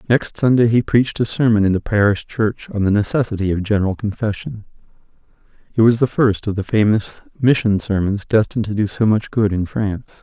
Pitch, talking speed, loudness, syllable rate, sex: 105 Hz, 195 wpm, -18 LUFS, 5.7 syllables/s, male